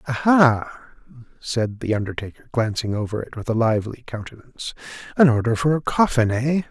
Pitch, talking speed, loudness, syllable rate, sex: 120 Hz, 150 wpm, -21 LUFS, 5.4 syllables/s, male